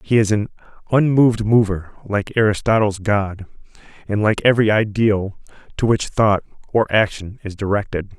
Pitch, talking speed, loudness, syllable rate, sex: 105 Hz, 140 wpm, -18 LUFS, 5.0 syllables/s, male